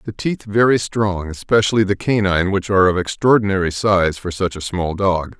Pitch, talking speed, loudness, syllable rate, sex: 95 Hz, 190 wpm, -17 LUFS, 5.3 syllables/s, male